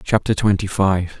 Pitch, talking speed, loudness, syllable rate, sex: 100 Hz, 150 wpm, -18 LUFS, 4.6 syllables/s, male